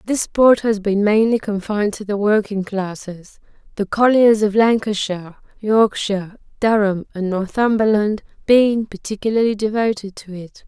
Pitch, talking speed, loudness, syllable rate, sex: 210 Hz, 130 wpm, -18 LUFS, 4.7 syllables/s, female